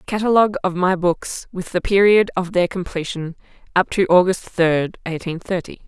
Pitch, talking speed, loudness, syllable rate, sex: 180 Hz, 165 wpm, -19 LUFS, 4.9 syllables/s, female